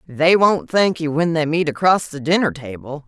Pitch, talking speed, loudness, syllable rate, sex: 160 Hz, 215 wpm, -17 LUFS, 4.8 syllables/s, female